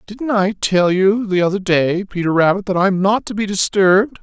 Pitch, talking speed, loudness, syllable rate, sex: 195 Hz, 215 wpm, -16 LUFS, 4.9 syllables/s, male